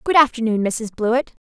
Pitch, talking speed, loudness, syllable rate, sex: 240 Hz, 165 wpm, -19 LUFS, 5.8 syllables/s, female